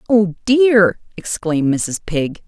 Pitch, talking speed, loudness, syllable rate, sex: 190 Hz, 120 wpm, -16 LUFS, 3.6 syllables/s, female